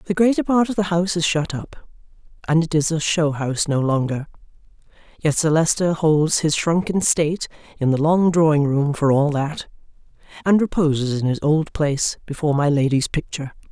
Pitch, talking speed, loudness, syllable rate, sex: 160 Hz, 185 wpm, -19 LUFS, 5.5 syllables/s, female